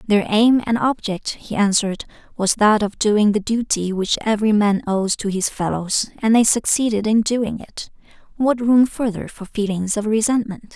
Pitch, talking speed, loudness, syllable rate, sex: 215 Hz, 175 wpm, -19 LUFS, 4.7 syllables/s, female